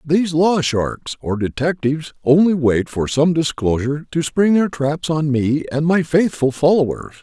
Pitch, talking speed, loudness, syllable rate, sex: 150 Hz, 165 wpm, -18 LUFS, 4.6 syllables/s, male